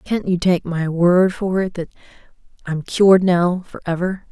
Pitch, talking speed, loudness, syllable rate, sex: 180 Hz, 140 wpm, -18 LUFS, 4.4 syllables/s, female